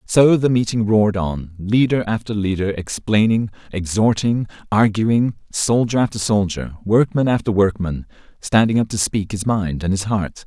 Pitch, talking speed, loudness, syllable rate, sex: 105 Hz, 150 wpm, -18 LUFS, 4.6 syllables/s, male